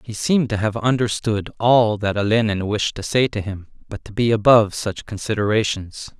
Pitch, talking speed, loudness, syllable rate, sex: 110 Hz, 185 wpm, -19 LUFS, 5.2 syllables/s, male